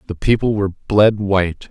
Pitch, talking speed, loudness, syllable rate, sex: 100 Hz, 175 wpm, -17 LUFS, 5.2 syllables/s, male